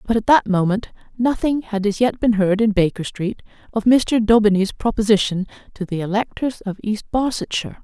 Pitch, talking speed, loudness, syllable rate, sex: 215 Hz, 175 wpm, -19 LUFS, 5.3 syllables/s, female